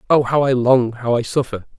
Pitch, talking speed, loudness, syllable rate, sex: 125 Hz, 235 wpm, -17 LUFS, 5.3 syllables/s, male